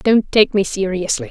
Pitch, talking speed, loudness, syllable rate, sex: 195 Hz, 185 wpm, -16 LUFS, 5.0 syllables/s, female